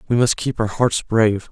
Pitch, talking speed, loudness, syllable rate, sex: 110 Hz, 240 wpm, -19 LUFS, 5.3 syllables/s, male